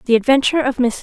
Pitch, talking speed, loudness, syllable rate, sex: 255 Hz, 235 wpm, -16 LUFS, 8.1 syllables/s, female